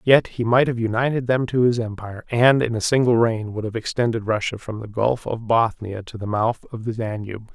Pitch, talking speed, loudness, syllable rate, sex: 115 Hz, 230 wpm, -21 LUFS, 5.4 syllables/s, male